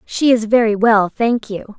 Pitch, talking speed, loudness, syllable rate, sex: 220 Hz, 200 wpm, -15 LUFS, 4.2 syllables/s, female